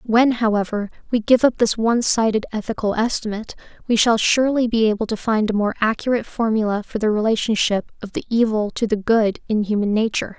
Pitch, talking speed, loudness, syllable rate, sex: 220 Hz, 190 wpm, -19 LUFS, 6.0 syllables/s, female